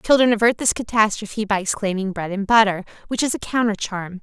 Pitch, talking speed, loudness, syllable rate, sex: 210 Hz, 200 wpm, -20 LUFS, 5.8 syllables/s, female